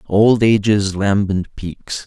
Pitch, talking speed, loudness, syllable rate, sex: 100 Hz, 115 wpm, -16 LUFS, 3.1 syllables/s, male